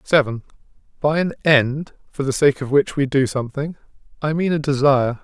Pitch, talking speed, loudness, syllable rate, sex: 140 Hz, 185 wpm, -19 LUFS, 5.4 syllables/s, male